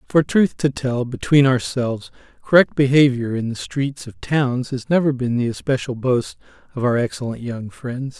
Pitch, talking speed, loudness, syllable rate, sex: 130 Hz, 175 wpm, -20 LUFS, 4.8 syllables/s, male